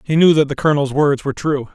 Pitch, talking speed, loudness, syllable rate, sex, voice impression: 145 Hz, 275 wpm, -16 LUFS, 6.8 syllables/s, male, masculine, adult-like, slightly thin, tensed, powerful, bright, clear, fluent, intellectual, refreshing, calm, lively, slightly strict